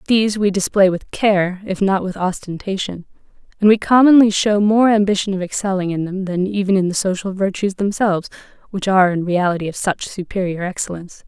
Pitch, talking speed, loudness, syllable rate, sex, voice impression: 195 Hz, 180 wpm, -17 LUFS, 5.7 syllables/s, female, feminine, adult-like, tensed, bright, clear, fluent, intellectual, calm, friendly, elegant, kind, modest